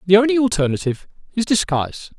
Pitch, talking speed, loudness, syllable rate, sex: 190 Hz, 140 wpm, -19 LUFS, 6.9 syllables/s, male